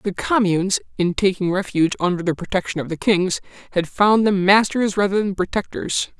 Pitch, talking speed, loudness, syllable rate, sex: 190 Hz, 175 wpm, -19 LUFS, 5.4 syllables/s, male